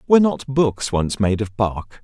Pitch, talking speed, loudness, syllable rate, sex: 120 Hz, 205 wpm, -20 LUFS, 4.3 syllables/s, male